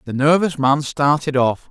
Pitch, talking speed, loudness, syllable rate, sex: 140 Hz, 175 wpm, -17 LUFS, 4.5 syllables/s, male